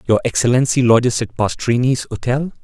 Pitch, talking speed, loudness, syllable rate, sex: 125 Hz, 135 wpm, -16 LUFS, 5.6 syllables/s, male